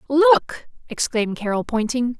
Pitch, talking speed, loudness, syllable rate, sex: 255 Hz, 110 wpm, -20 LUFS, 4.4 syllables/s, female